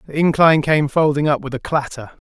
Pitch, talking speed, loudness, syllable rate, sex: 145 Hz, 210 wpm, -17 LUFS, 5.9 syllables/s, male